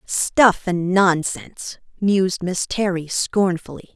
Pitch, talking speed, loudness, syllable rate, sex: 185 Hz, 105 wpm, -19 LUFS, 3.7 syllables/s, female